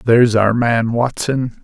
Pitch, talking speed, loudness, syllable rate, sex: 120 Hz, 145 wpm, -15 LUFS, 4.0 syllables/s, male